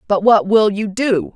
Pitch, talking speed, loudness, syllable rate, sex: 205 Hz, 220 wpm, -15 LUFS, 4.2 syllables/s, female